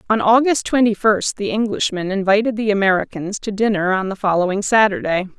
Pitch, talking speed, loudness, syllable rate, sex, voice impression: 205 Hz, 165 wpm, -17 LUFS, 5.7 syllables/s, female, feminine, adult-like, powerful, slightly soft, fluent, raspy, intellectual, friendly, slightly reassuring, kind, modest